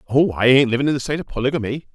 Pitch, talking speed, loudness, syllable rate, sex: 135 Hz, 275 wpm, -18 LUFS, 8.2 syllables/s, male